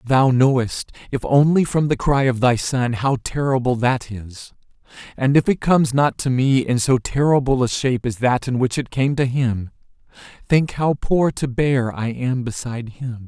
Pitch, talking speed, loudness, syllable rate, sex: 130 Hz, 195 wpm, -19 LUFS, 4.6 syllables/s, male